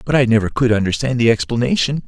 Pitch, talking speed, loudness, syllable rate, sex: 120 Hz, 205 wpm, -16 LUFS, 6.8 syllables/s, male